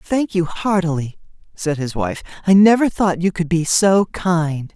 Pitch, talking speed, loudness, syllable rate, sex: 175 Hz, 175 wpm, -17 LUFS, 4.3 syllables/s, male